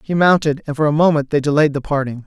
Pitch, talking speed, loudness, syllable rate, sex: 150 Hz, 265 wpm, -16 LUFS, 6.6 syllables/s, male